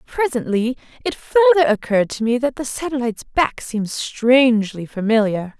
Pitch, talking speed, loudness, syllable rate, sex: 245 Hz, 140 wpm, -18 LUFS, 5.0 syllables/s, female